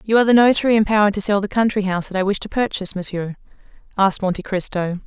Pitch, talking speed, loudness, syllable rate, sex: 200 Hz, 225 wpm, -18 LUFS, 7.6 syllables/s, female